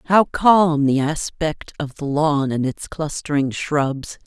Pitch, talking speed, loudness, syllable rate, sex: 150 Hz, 155 wpm, -20 LUFS, 3.5 syllables/s, female